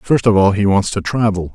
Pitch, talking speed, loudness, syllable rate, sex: 100 Hz, 270 wpm, -15 LUFS, 5.3 syllables/s, male